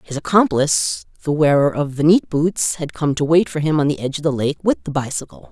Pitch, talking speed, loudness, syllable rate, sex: 155 Hz, 250 wpm, -18 LUFS, 5.8 syllables/s, female